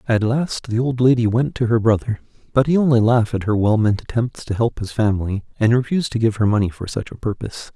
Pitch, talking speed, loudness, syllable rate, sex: 115 Hz, 250 wpm, -19 LUFS, 6.2 syllables/s, male